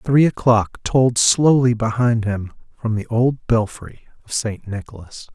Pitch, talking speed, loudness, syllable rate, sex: 115 Hz, 145 wpm, -18 LUFS, 4.2 syllables/s, male